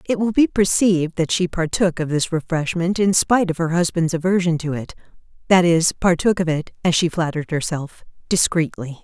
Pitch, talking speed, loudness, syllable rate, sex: 170 Hz, 185 wpm, -19 LUFS, 5.4 syllables/s, female